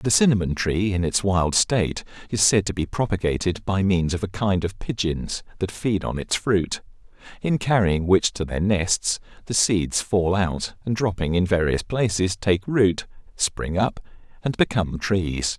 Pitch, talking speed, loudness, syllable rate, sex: 95 Hz, 175 wpm, -23 LUFS, 4.4 syllables/s, male